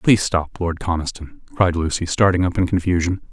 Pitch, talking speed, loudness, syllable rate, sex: 85 Hz, 180 wpm, -20 LUFS, 5.9 syllables/s, male